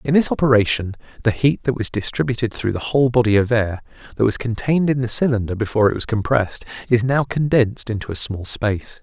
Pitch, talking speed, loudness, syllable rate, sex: 115 Hz, 205 wpm, -19 LUFS, 6.3 syllables/s, male